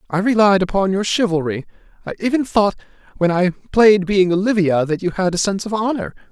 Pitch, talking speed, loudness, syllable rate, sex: 190 Hz, 190 wpm, -17 LUFS, 5.8 syllables/s, male